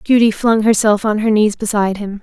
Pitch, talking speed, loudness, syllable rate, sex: 215 Hz, 215 wpm, -14 LUFS, 5.6 syllables/s, female